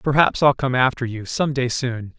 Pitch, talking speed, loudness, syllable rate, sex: 130 Hz, 220 wpm, -20 LUFS, 4.9 syllables/s, male